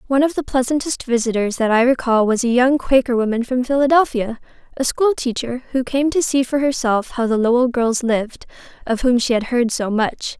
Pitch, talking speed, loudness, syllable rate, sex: 250 Hz, 210 wpm, -18 LUFS, 5.5 syllables/s, female